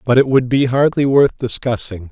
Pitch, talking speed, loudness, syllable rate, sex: 125 Hz, 200 wpm, -15 LUFS, 5.0 syllables/s, male